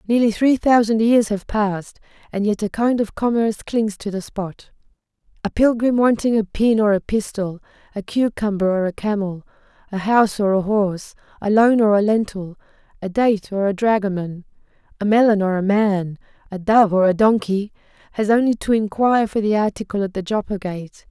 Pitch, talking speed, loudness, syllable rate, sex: 210 Hz, 185 wpm, -19 LUFS, 5.3 syllables/s, female